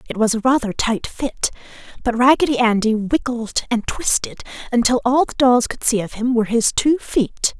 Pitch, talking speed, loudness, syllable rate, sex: 240 Hz, 190 wpm, -18 LUFS, 5.0 syllables/s, female